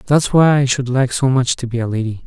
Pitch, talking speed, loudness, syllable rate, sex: 130 Hz, 290 wpm, -16 LUFS, 5.7 syllables/s, male